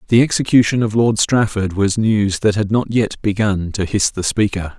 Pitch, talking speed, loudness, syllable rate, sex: 105 Hz, 200 wpm, -16 LUFS, 4.9 syllables/s, male